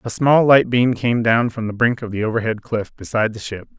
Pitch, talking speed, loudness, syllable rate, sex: 115 Hz, 255 wpm, -18 LUFS, 5.6 syllables/s, male